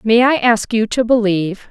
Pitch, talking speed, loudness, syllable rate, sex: 225 Hz, 210 wpm, -15 LUFS, 5.0 syllables/s, female